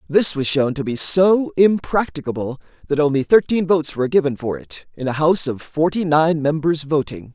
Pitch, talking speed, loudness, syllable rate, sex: 155 Hz, 190 wpm, -18 LUFS, 5.3 syllables/s, male